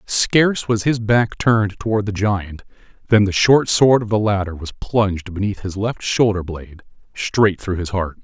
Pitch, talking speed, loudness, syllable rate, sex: 105 Hz, 190 wpm, -18 LUFS, 4.7 syllables/s, male